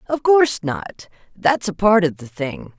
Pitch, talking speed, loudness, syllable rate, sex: 195 Hz, 195 wpm, -19 LUFS, 4.3 syllables/s, female